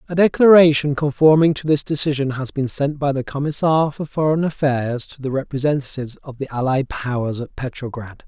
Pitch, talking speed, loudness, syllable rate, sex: 140 Hz, 175 wpm, -19 LUFS, 5.5 syllables/s, male